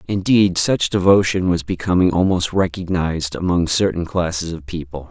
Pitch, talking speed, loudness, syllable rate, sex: 90 Hz, 140 wpm, -18 LUFS, 5.1 syllables/s, male